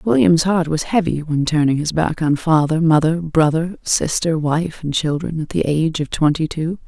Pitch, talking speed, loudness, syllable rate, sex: 160 Hz, 190 wpm, -18 LUFS, 4.8 syllables/s, female